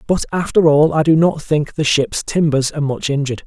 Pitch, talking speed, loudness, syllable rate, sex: 150 Hz, 225 wpm, -16 LUFS, 5.6 syllables/s, male